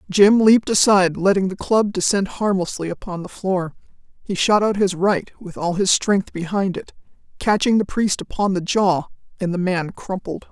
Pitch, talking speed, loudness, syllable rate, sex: 190 Hz, 185 wpm, -19 LUFS, 4.9 syllables/s, female